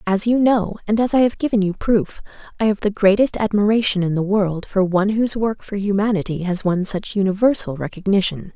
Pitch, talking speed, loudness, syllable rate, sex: 200 Hz, 205 wpm, -19 LUFS, 5.7 syllables/s, female